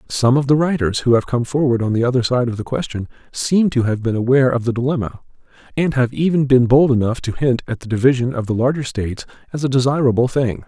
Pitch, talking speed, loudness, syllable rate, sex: 125 Hz, 235 wpm, -17 LUFS, 6.2 syllables/s, male